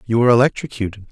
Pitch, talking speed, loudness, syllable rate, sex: 115 Hz, 160 wpm, -17 LUFS, 8.2 syllables/s, male